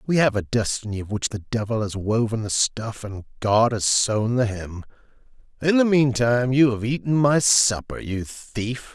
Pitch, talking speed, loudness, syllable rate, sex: 115 Hz, 190 wpm, -22 LUFS, 4.6 syllables/s, male